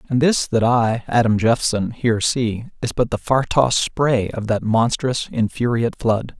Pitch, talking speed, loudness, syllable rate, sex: 120 Hz, 180 wpm, -19 LUFS, 4.5 syllables/s, male